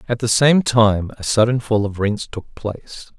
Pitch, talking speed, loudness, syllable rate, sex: 115 Hz, 205 wpm, -18 LUFS, 4.5 syllables/s, male